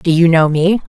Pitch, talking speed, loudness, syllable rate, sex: 170 Hz, 255 wpm, -12 LUFS, 4.9 syllables/s, female